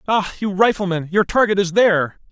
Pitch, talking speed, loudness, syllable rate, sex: 195 Hz, 180 wpm, -17 LUFS, 5.6 syllables/s, male